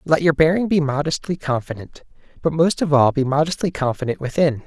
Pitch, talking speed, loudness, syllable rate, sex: 150 Hz, 180 wpm, -19 LUFS, 5.7 syllables/s, male